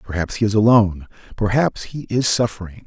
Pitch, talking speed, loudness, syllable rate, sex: 110 Hz, 165 wpm, -18 LUFS, 5.7 syllables/s, male